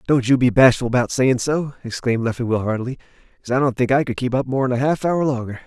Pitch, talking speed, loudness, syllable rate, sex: 130 Hz, 245 wpm, -19 LUFS, 6.9 syllables/s, male